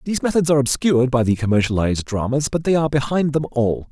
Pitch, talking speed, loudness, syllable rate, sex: 135 Hz, 215 wpm, -19 LUFS, 6.9 syllables/s, male